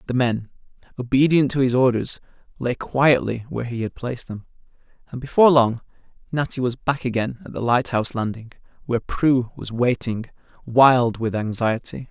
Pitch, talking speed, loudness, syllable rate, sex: 125 Hz, 155 wpm, -21 LUFS, 5.3 syllables/s, male